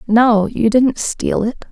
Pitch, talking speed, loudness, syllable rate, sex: 230 Hz, 175 wpm, -15 LUFS, 3.3 syllables/s, female